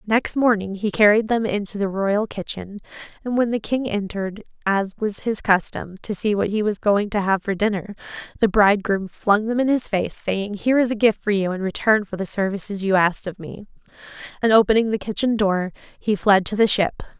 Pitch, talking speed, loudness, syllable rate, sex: 205 Hz, 215 wpm, -21 LUFS, 5.4 syllables/s, female